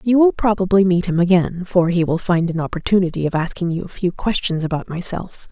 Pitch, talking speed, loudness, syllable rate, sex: 180 Hz, 220 wpm, -18 LUFS, 5.8 syllables/s, female